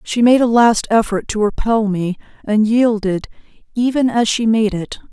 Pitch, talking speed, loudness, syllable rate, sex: 220 Hz, 175 wpm, -16 LUFS, 4.7 syllables/s, female